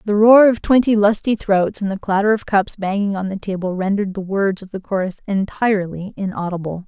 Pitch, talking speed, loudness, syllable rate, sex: 200 Hz, 200 wpm, -18 LUFS, 5.6 syllables/s, female